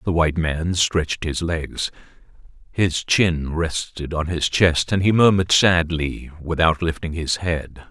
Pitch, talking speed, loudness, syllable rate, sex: 85 Hz, 150 wpm, -20 LUFS, 4.1 syllables/s, male